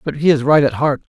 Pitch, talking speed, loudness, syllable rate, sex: 145 Hz, 315 wpm, -15 LUFS, 6.3 syllables/s, male